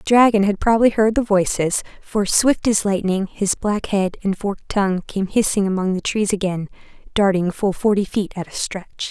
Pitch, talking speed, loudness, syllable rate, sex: 200 Hz, 200 wpm, -19 LUFS, 5.2 syllables/s, female